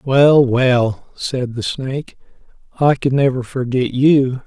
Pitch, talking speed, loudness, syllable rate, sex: 130 Hz, 135 wpm, -16 LUFS, 3.5 syllables/s, male